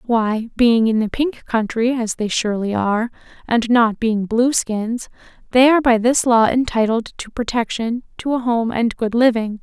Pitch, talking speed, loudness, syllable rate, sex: 230 Hz, 175 wpm, -18 LUFS, 4.6 syllables/s, female